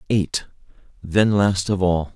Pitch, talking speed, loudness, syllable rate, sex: 95 Hz, 140 wpm, -20 LUFS, 5.0 syllables/s, male